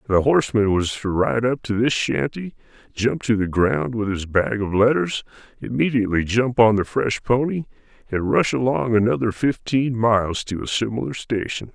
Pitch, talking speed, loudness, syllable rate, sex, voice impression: 115 Hz, 175 wpm, -21 LUFS, 4.9 syllables/s, male, very masculine, old, thick, sincere, calm, mature, wild